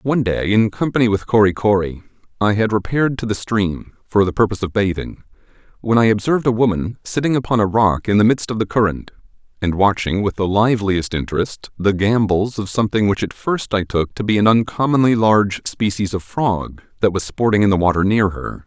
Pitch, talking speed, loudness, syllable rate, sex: 105 Hz, 205 wpm, -18 LUFS, 5.7 syllables/s, male